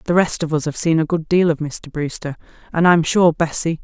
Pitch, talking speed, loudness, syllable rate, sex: 160 Hz, 250 wpm, -18 LUFS, 5.6 syllables/s, female